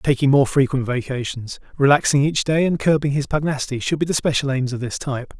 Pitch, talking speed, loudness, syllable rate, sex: 140 Hz, 210 wpm, -20 LUFS, 6.0 syllables/s, male